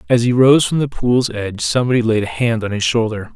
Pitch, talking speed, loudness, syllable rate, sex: 115 Hz, 250 wpm, -16 LUFS, 6.0 syllables/s, male